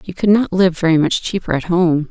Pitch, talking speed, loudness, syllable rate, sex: 175 Hz, 255 wpm, -16 LUFS, 5.5 syllables/s, female